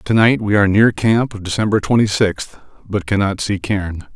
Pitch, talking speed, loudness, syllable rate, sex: 105 Hz, 200 wpm, -16 LUFS, 5.0 syllables/s, male